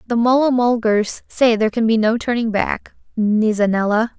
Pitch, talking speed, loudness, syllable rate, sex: 225 Hz, 170 wpm, -17 LUFS, 4.9 syllables/s, female